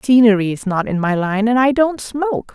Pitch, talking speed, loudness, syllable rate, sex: 225 Hz, 235 wpm, -16 LUFS, 5.4 syllables/s, female